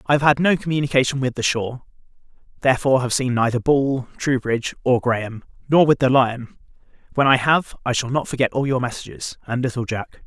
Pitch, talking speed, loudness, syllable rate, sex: 130 Hz, 195 wpm, -20 LUFS, 6.0 syllables/s, male